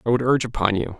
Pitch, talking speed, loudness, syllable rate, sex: 115 Hz, 300 wpm, -21 LUFS, 8.2 syllables/s, male